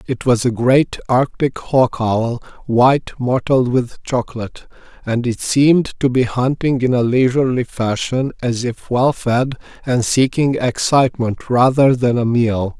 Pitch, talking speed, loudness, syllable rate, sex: 125 Hz, 150 wpm, -16 LUFS, 4.4 syllables/s, male